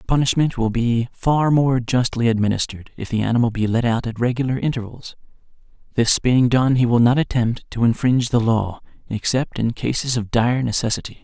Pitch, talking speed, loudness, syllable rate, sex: 120 Hz, 180 wpm, -19 LUFS, 5.5 syllables/s, male